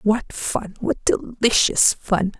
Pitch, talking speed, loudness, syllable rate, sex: 210 Hz, 100 wpm, -20 LUFS, 3.3 syllables/s, female